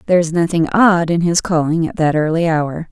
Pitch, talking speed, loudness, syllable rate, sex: 165 Hz, 225 wpm, -15 LUFS, 5.5 syllables/s, female